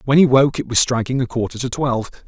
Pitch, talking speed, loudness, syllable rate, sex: 125 Hz, 265 wpm, -18 LUFS, 6.5 syllables/s, male